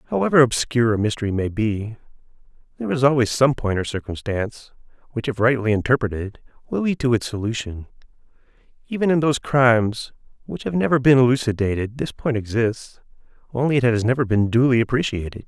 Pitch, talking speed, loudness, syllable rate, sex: 120 Hz, 160 wpm, -20 LUFS, 6.1 syllables/s, male